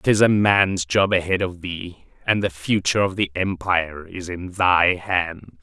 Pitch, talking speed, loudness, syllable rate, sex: 90 Hz, 180 wpm, -20 LUFS, 4.1 syllables/s, male